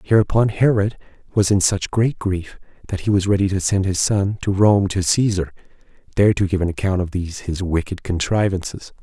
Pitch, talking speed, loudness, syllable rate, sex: 95 Hz, 195 wpm, -19 LUFS, 5.4 syllables/s, male